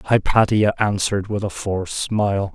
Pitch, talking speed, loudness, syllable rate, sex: 100 Hz, 140 wpm, -20 LUFS, 4.9 syllables/s, male